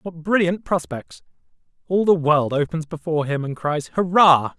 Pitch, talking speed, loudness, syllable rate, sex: 165 Hz, 155 wpm, -20 LUFS, 4.7 syllables/s, male